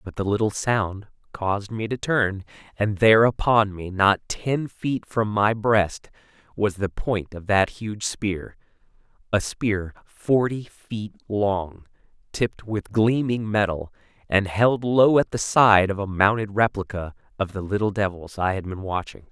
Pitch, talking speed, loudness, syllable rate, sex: 105 Hz, 160 wpm, -23 LUFS, 4.1 syllables/s, male